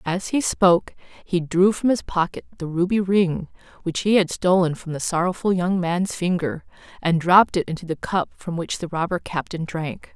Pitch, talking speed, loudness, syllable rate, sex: 175 Hz, 195 wpm, -22 LUFS, 5.0 syllables/s, female